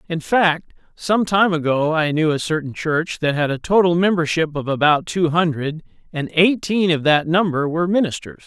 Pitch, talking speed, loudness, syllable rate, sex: 165 Hz, 185 wpm, -18 LUFS, 4.9 syllables/s, male